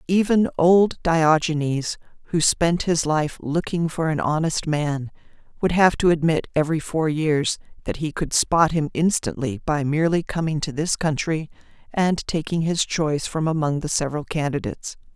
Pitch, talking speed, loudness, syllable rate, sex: 160 Hz, 160 wpm, -22 LUFS, 4.8 syllables/s, female